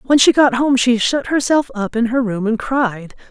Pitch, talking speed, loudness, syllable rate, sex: 245 Hz, 235 wpm, -16 LUFS, 4.7 syllables/s, female